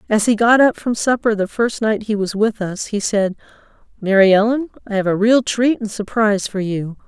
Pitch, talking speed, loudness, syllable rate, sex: 215 Hz, 220 wpm, -17 LUFS, 5.1 syllables/s, female